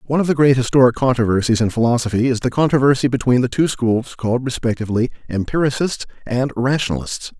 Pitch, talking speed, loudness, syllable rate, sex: 125 Hz, 160 wpm, -18 LUFS, 6.5 syllables/s, male